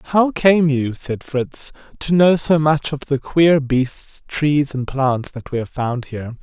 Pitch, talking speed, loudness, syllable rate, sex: 145 Hz, 195 wpm, -18 LUFS, 3.8 syllables/s, male